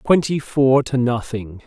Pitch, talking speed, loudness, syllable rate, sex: 130 Hz, 145 wpm, -19 LUFS, 3.9 syllables/s, male